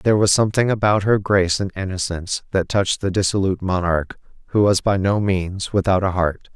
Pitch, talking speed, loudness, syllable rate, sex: 95 Hz, 190 wpm, -19 LUFS, 5.8 syllables/s, male